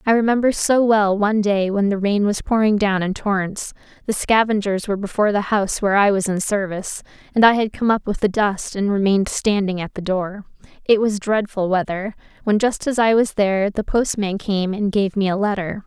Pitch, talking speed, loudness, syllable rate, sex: 205 Hz, 210 wpm, -19 LUFS, 5.5 syllables/s, female